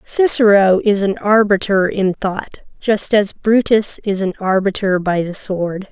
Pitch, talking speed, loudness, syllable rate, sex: 200 Hz, 150 wpm, -15 LUFS, 4.1 syllables/s, female